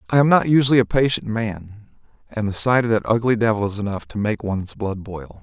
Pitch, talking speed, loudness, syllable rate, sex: 110 Hz, 230 wpm, -20 LUFS, 5.8 syllables/s, male